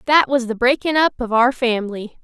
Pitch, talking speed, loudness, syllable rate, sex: 250 Hz, 215 wpm, -17 LUFS, 5.5 syllables/s, female